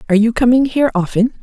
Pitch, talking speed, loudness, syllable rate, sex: 235 Hz, 210 wpm, -14 LUFS, 7.8 syllables/s, female